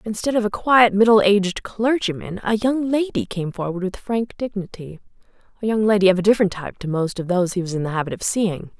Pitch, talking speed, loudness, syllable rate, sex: 200 Hz, 220 wpm, -20 LUFS, 6.0 syllables/s, female